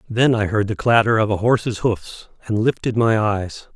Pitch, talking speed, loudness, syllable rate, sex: 110 Hz, 210 wpm, -19 LUFS, 4.8 syllables/s, male